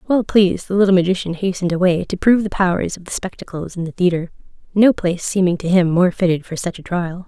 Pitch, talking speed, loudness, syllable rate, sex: 180 Hz, 230 wpm, -18 LUFS, 6.4 syllables/s, female